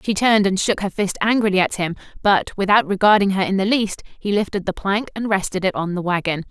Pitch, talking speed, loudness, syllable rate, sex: 195 Hz, 240 wpm, -19 LUFS, 6.0 syllables/s, female